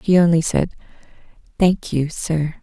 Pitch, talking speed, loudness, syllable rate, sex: 165 Hz, 135 wpm, -19 LUFS, 4.2 syllables/s, female